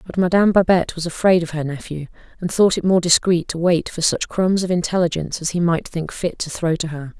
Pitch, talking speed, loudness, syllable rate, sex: 170 Hz, 240 wpm, -19 LUFS, 6.0 syllables/s, female